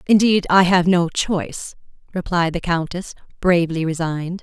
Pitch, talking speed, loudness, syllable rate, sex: 175 Hz, 135 wpm, -19 LUFS, 5.0 syllables/s, female